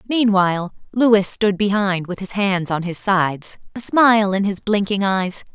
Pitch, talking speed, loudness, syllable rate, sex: 200 Hz, 175 wpm, -18 LUFS, 4.4 syllables/s, female